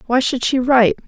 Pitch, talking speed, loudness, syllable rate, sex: 250 Hz, 225 wpm, -16 LUFS, 6.3 syllables/s, female